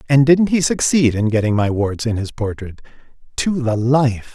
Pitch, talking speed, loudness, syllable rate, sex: 125 Hz, 180 wpm, -17 LUFS, 4.7 syllables/s, male